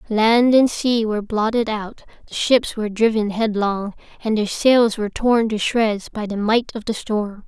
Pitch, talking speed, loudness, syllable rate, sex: 220 Hz, 195 wpm, -19 LUFS, 4.5 syllables/s, female